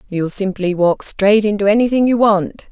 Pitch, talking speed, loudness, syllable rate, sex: 205 Hz, 175 wpm, -15 LUFS, 4.7 syllables/s, female